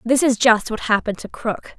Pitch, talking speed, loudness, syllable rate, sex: 230 Hz, 235 wpm, -19 LUFS, 5.3 syllables/s, female